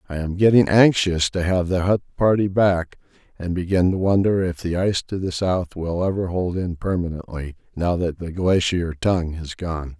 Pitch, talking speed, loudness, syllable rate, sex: 90 Hz, 190 wpm, -21 LUFS, 4.9 syllables/s, male